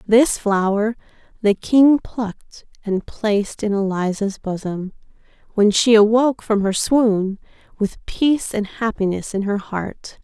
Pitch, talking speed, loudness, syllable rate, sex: 215 Hz, 135 wpm, -19 LUFS, 4.1 syllables/s, female